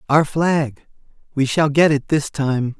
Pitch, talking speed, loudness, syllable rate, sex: 145 Hz, 150 wpm, -18 LUFS, 3.7 syllables/s, male